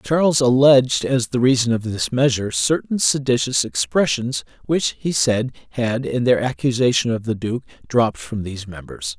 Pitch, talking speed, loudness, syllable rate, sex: 125 Hz, 165 wpm, -19 LUFS, 5.0 syllables/s, male